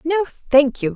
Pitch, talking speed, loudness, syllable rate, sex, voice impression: 300 Hz, 190 wpm, -17 LUFS, 4.9 syllables/s, female, feminine, slightly adult-like, slightly powerful, clear, slightly cute, slightly unique, slightly lively